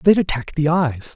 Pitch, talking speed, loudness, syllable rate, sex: 155 Hz, 205 wpm, -19 LUFS, 4.5 syllables/s, male